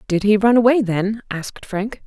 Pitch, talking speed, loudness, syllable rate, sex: 210 Hz, 205 wpm, -18 LUFS, 5.0 syllables/s, female